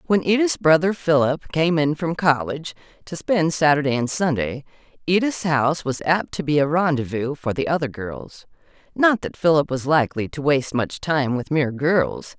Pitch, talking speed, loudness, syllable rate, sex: 150 Hz, 180 wpm, -21 LUFS, 5.0 syllables/s, female